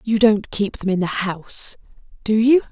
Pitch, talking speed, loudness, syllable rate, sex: 210 Hz, 175 wpm, -20 LUFS, 4.8 syllables/s, female